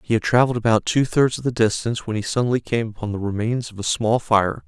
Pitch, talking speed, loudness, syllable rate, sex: 115 Hz, 255 wpm, -21 LUFS, 6.4 syllables/s, male